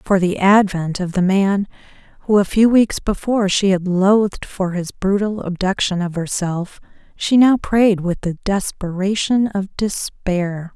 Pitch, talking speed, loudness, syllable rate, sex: 195 Hz, 155 wpm, -18 LUFS, 4.1 syllables/s, female